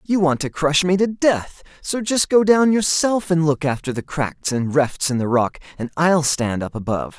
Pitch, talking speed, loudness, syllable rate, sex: 160 Hz, 225 wpm, -19 LUFS, 4.6 syllables/s, male